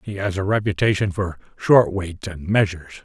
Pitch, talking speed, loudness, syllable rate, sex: 95 Hz, 180 wpm, -20 LUFS, 5.1 syllables/s, male